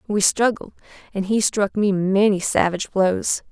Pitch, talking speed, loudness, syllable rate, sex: 200 Hz, 155 wpm, -20 LUFS, 4.5 syllables/s, female